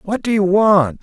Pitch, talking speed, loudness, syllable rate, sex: 190 Hz, 235 wpm, -15 LUFS, 4.3 syllables/s, male